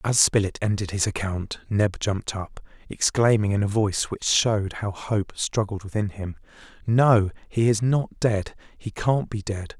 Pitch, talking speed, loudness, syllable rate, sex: 105 Hz, 170 wpm, -24 LUFS, 4.5 syllables/s, male